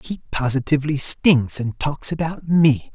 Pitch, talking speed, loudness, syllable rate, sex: 145 Hz, 145 wpm, -19 LUFS, 4.4 syllables/s, male